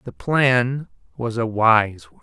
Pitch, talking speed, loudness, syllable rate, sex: 120 Hz, 160 wpm, -19 LUFS, 3.8 syllables/s, male